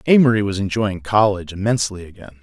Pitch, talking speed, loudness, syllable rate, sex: 105 Hz, 150 wpm, -18 LUFS, 6.8 syllables/s, male